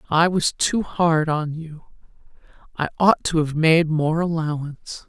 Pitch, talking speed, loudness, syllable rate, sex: 160 Hz, 140 wpm, -20 LUFS, 4.1 syllables/s, female